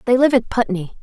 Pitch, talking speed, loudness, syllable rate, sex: 235 Hz, 235 wpm, -17 LUFS, 6.0 syllables/s, female